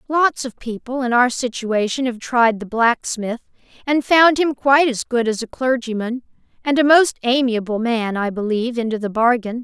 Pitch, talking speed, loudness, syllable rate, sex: 240 Hz, 180 wpm, -18 LUFS, 4.9 syllables/s, female